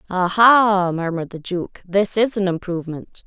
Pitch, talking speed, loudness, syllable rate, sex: 190 Hz, 165 wpm, -18 LUFS, 4.6 syllables/s, female